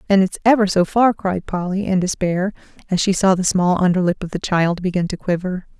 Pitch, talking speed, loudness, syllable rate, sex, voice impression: 185 Hz, 230 wpm, -18 LUFS, 5.5 syllables/s, female, feminine, very adult-like, soft, sincere, very calm, very elegant, slightly kind